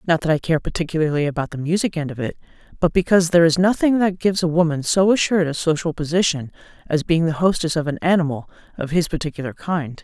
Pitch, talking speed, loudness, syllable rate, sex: 165 Hz, 215 wpm, -20 LUFS, 6.7 syllables/s, female